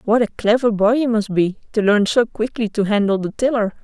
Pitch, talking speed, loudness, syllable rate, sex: 215 Hz, 235 wpm, -18 LUFS, 5.4 syllables/s, female